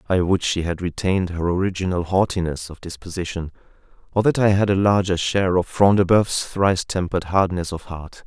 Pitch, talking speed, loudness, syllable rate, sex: 90 Hz, 190 wpm, -20 LUFS, 5.6 syllables/s, male